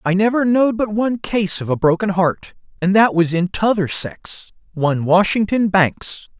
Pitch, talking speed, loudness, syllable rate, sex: 195 Hz, 180 wpm, -17 LUFS, 4.8 syllables/s, male